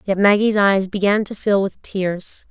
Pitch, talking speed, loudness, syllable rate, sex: 200 Hz, 190 wpm, -18 LUFS, 4.2 syllables/s, female